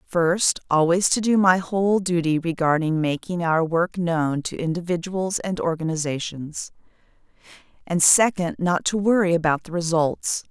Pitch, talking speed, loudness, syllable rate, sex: 170 Hz, 135 wpm, -21 LUFS, 4.5 syllables/s, female